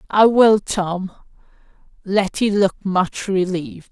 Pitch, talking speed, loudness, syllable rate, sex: 195 Hz, 105 wpm, -18 LUFS, 4.0 syllables/s, female